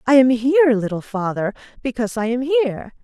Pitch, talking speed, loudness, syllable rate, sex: 235 Hz, 180 wpm, -19 LUFS, 6.0 syllables/s, female